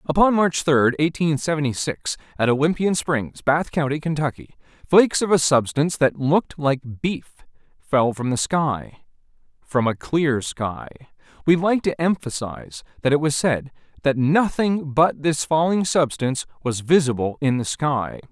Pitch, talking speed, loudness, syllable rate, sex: 145 Hz, 150 wpm, -21 LUFS, 4.6 syllables/s, male